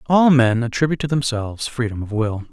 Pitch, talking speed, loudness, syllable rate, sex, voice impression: 125 Hz, 190 wpm, -19 LUFS, 5.9 syllables/s, male, very masculine, middle-aged, thick, slightly tensed, powerful, bright, slightly soft, clear, fluent, slightly raspy, cool, very intellectual, slightly refreshing, very sincere, very calm, mature, friendly, reassuring, unique, slightly elegant, wild, slightly sweet, lively, kind, slightly sharp